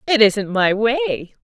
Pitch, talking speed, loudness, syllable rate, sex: 235 Hz, 165 wpm, -17 LUFS, 3.3 syllables/s, female